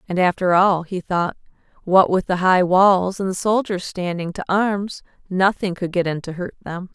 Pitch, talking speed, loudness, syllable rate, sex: 185 Hz, 200 wpm, -19 LUFS, 4.6 syllables/s, female